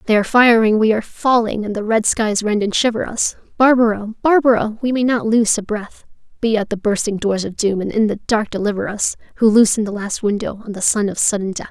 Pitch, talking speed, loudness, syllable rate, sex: 215 Hz, 235 wpm, -17 LUFS, 5.9 syllables/s, female